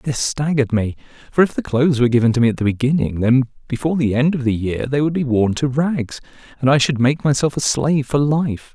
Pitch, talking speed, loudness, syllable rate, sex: 130 Hz, 245 wpm, -18 LUFS, 6.1 syllables/s, male